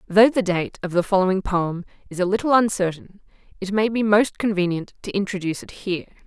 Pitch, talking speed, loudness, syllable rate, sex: 195 Hz, 190 wpm, -21 LUFS, 5.9 syllables/s, female